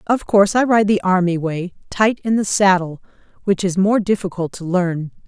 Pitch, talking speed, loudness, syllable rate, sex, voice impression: 190 Hz, 195 wpm, -17 LUFS, 5.0 syllables/s, female, feminine, middle-aged, tensed, powerful, clear, fluent, intellectual, lively, strict, slightly intense, sharp